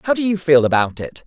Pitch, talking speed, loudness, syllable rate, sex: 160 Hz, 285 wpm, -16 LUFS, 5.7 syllables/s, male